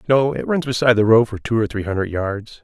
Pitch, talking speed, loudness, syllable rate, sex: 115 Hz, 275 wpm, -18 LUFS, 6.1 syllables/s, male